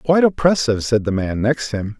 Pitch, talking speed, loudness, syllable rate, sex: 125 Hz, 210 wpm, -18 LUFS, 5.6 syllables/s, male